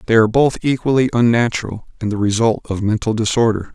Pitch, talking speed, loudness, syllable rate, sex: 115 Hz, 175 wpm, -17 LUFS, 6.3 syllables/s, male